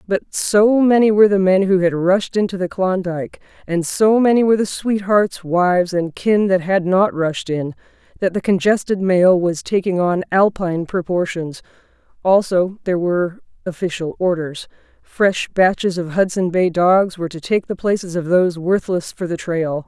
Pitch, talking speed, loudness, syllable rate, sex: 185 Hz, 170 wpm, -17 LUFS, 4.8 syllables/s, female